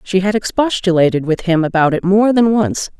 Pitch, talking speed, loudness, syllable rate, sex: 190 Hz, 200 wpm, -14 LUFS, 5.3 syllables/s, female